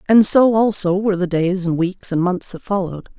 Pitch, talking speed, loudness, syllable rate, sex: 190 Hz, 225 wpm, -18 LUFS, 5.5 syllables/s, female